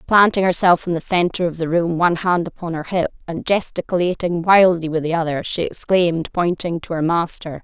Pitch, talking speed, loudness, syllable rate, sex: 170 Hz, 195 wpm, -18 LUFS, 5.5 syllables/s, female